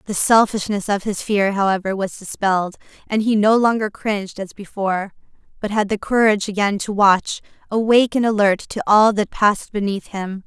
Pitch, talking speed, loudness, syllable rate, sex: 205 Hz, 180 wpm, -18 LUFS, 5.3 syllables/s, female